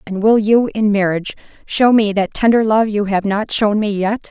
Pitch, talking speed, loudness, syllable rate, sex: 210 Hz, 225 wpm, -15 LUFS, 4.9 syllables/s, female